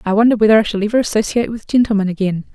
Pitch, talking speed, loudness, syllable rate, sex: 215 Hz, 235 wpm, -15 LUFS, 8.0 syllables/s, female